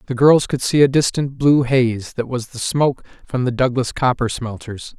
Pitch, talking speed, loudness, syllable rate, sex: 130 Hz, 205 wpm, -18 LUFS, 4.8 syllables/s, male